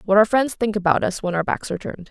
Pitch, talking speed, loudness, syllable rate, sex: 200 Hz, 315 wpm, -21 LUFS, 7.0 syllables/s, female